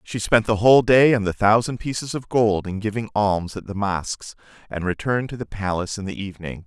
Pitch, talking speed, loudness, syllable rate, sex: 105 Hz, 225 wpm, -21 LUFS, 5.7 syllables/s, male